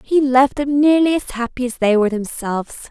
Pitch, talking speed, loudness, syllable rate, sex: 255 Hz, 205 wpm, -17 LUFS, 5.3 syllables/s, female